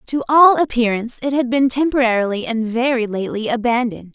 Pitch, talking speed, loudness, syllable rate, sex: 245 Hz, 160 wpm, -17 LUFS, 6.1 syllables/s, female